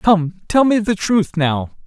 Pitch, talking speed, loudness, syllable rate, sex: 190 Hz, 160 wpm, -17 LUFS, 3.9 syllables/s, male